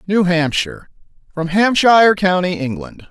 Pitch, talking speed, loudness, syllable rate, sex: 185 Hz, 95 wpm, -15 LUFS, 4.8 syllables/s, male